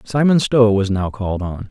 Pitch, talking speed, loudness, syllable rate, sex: 110 Hz, 210 wpm, -17 LUFS, 5.0 syllables/s, male